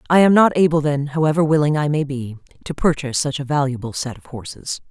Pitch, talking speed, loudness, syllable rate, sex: 145 Hz, 220 wpm, -18 LUFS, 6.2 syllables/s, female